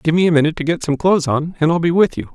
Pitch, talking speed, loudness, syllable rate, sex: 165 Hz, 360 wpm, -16 LUFS, 7.6 syllables/s, male